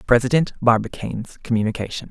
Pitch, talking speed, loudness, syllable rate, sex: 120 Hz, 85 wpm, -21 LUFS, 6.5 syllables/s, male